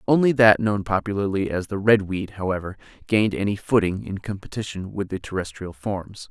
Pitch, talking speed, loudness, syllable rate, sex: 100 Hz, 160 wpm, -23 LUFS, 5.3 syllables/s, male